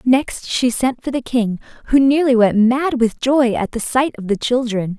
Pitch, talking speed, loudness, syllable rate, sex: 245 Hz, 215 wpm, -17 LUFS, 4.4 syllables/s, female